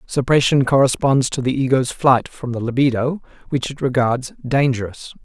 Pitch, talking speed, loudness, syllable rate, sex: 130 Hz, 150 wpm, -18 LUFS, 5.0 syllables/s, male